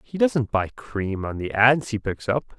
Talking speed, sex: 230 wpm, male